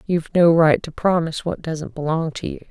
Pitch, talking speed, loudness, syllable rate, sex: 165 Hz, 220 wpm, -20 LUFS, 5.7 syllables/s, female